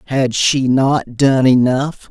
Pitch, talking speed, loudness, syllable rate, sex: 130 Hz, 140 wpm, -14 LUFS, 3.2 syllables/s, male